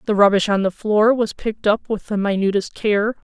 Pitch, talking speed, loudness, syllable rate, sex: 210 Hz, 215 wpm, -19 LUFS, 5.2 syllables/s, female